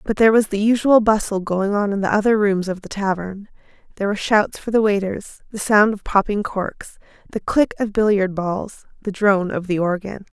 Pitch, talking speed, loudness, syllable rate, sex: 205 Hz, 210 wpm, -19 LUFS, 5.5 syllables/s, female